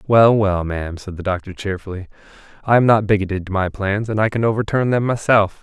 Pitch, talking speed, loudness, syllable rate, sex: 100 Hz, 215 wpm, -18 LUFS, 5.9 syllables/s, male